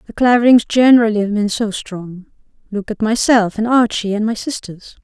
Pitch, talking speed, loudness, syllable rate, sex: 220 Hz, 180 wpm, -15 LUFS, 5.3 syllables/s, female